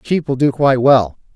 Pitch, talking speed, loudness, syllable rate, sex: 135 Hz, 220 wpm, -14 LUFS, 5.4 syllables/s, male